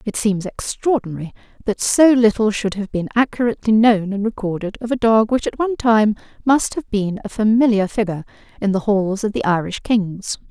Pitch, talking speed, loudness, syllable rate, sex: 215 Hz, 190 wpm, -18 LUFS, 5.5 syllables/s, female